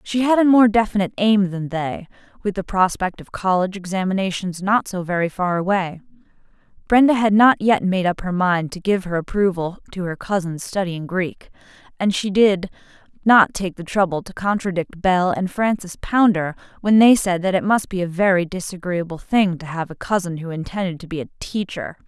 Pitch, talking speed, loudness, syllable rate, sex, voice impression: 190 Hz, 190 wpm, -20 LUFS, 5.3 syllables/s, female, feminine, middle-aged, slightly powerful, slightly soft, fluent, intellectual, calm, slightly friendly, slightly reassuring, elegant, lively, slightly sharp